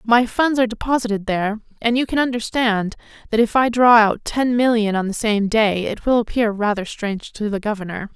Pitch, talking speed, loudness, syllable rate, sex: 225 Hz, 205 wpm, -19 LUFS, 5.5 syllables/s, female